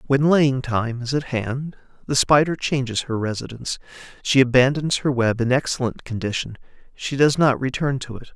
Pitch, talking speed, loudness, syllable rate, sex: 130 Hz, 170 wpm, -21 LUFS, 5.1 syllables/s, male